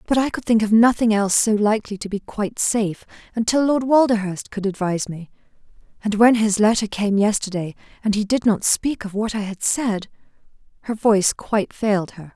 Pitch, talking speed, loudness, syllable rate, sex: 210 Hz, 195 wpm, -20 LUFS, 5.7 syllables/s, female